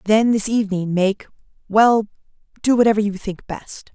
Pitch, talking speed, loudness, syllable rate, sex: 210 Hz, 120 wpm, -18 LUFS, 4.9 syllables/s, female